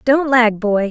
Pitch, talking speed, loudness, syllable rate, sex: 235 Hz, 200 wpm, -14 LUFS, 3.5 syllables/s, female